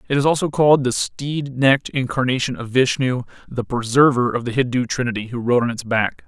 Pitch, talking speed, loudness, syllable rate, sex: 125 Hz, 200 wpm, -19 LUFS, 5.6 syllables/s, male